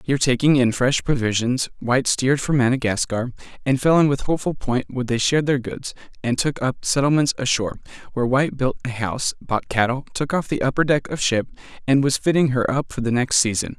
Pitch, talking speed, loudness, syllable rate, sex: 130 Hz, 210 wpm, -21 LUFS, 6.0 syllables/s, male